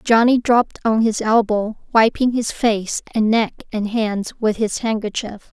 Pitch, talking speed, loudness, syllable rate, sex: 220 Hz, 160 wpm, -18 LUFS, 4.3 syllables/s, female